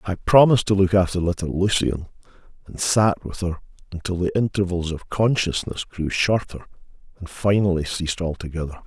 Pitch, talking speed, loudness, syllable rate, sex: 90 Hz, 150 wpm, -21 LUFS, 5.4 syllables/s, male